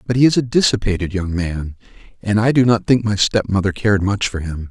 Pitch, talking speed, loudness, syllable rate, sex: 105 Hz, 230 wpm, -17 LUFS, 5.9 syllables/s, male